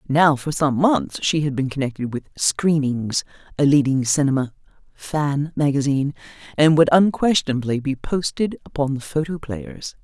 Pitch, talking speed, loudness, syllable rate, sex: 140 Hz, 135 wpm, -20 LUFS, 4.7 syllables/s, female